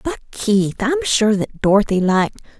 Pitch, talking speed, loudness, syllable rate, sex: 210 Hz, 160 wpm, -17 LUFS, 5.0 syllables/s, female